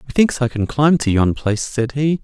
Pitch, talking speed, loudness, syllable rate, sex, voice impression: 130 Hz, 240 wpm, -17 LUFS, 5.9 syllables/s, male, masculine, adult-like, slightly dark, slightly cool, slightly sincere, calm, slightly kind